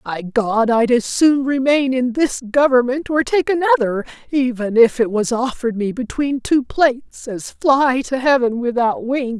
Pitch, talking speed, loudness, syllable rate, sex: 250 Hz, 170 wpm, -17 LUFS, 4.5 syllables/s, female